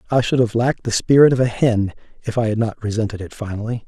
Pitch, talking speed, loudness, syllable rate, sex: 115 Hz, 250 wpm, -19 LUFS, 6.6 syllables/s, male